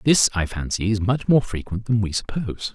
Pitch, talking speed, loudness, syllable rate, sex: 105 Hz, 220 wpm, -22 LUFS, 5.4 syllables/s, male